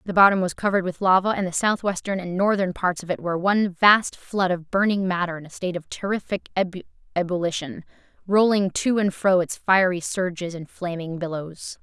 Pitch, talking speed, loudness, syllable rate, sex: 185 Hz, 190 wpm, -22 LUFS, 5.3 syllables/s, female